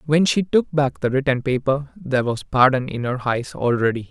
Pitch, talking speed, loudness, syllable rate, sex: 135 Hz, 205 wpm, -20 LUFS, 5.1 syllables/s, male